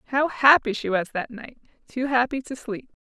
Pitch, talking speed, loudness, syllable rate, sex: 250 Hz, 180 wpm, -23 LUFS, 5.1 syllables/s, female